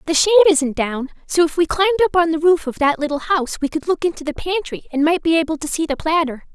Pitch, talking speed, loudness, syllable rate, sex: 320 Hz, 275 wpm, -18 LUFS, 6.6 syllables/s, female